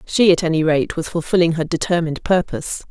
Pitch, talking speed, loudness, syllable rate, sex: 165 Hz, 185 wpm, -18 LUFS, 6.2 syllables/s, female